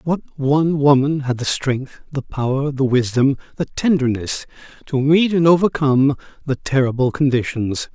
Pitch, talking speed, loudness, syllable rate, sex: 140 Hz, 145 wpm, -18 LUFS, 4.8 syllables/s, male